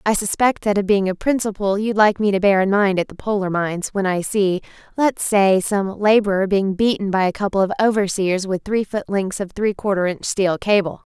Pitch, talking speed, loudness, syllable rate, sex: 200 Hz, 225 wpm, -19 LUFS, 5.3 syllables/s, female